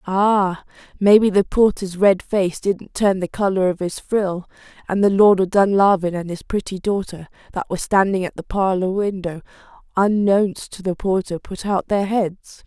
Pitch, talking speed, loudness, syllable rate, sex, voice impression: 190 Hz, 175 wpm, -19 LUFS, 4.6 syllables/s, female, very feminine, adult-like, slightly middle-aged, thin, slightly relaxed, weak, slightly bright, hard, clear, slightly halting, slightly cute, intellectual, slightly refreshing, sincere, slightly calm, friendly, reassuring, unique, slightly elegant, wild, slightly sweet, lively, strict, slightly intense, sharp, light